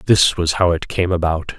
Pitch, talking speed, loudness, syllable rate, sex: 90 Hz, 225 wpm, -17 LUFS, 4.6 syllables/s, male